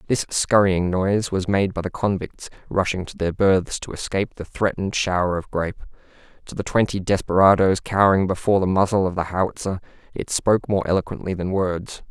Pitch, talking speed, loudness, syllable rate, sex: 95 Hz, 180 wpm, -21 LUFS, 5.7 syllables/s, male